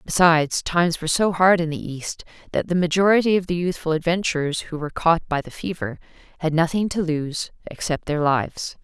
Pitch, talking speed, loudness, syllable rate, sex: 170 Hz, 190 wpm, -21 LUFS, 5.6 syllables/s, female